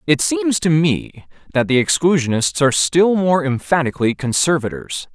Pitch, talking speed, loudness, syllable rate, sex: 150 Hz, 140 wpm, -17 LUFS, 4.9 syllables/s, male